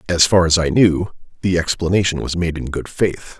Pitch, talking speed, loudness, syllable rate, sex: 85 Hz, 210 wpm, -17 LUFS, 5.6 syllables/s, male